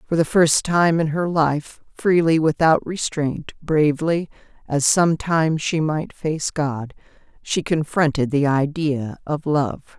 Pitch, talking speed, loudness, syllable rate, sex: 155 Hz, 140 wpm, -20 LUFS, 3.9 syllables/s, female